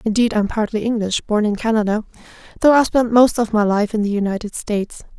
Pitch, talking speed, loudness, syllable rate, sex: 220 Hz, 210 wpm, -18 LUFS, 6.2 syllables/s, female